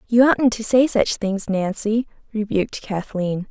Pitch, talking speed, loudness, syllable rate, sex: 215 Hz, 155 wpm, -20 LUFS, 4.2 syllables/s, female